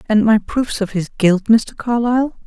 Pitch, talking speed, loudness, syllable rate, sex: 220 Hz, 195 wpm, -16 LUFS, 4.7 syllables/s, female